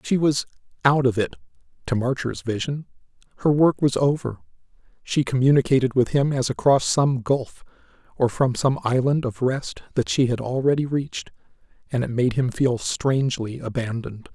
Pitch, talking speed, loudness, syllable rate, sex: 130 Hz, 160 wpm, -22 LUFS, 5.1 syllables/s, male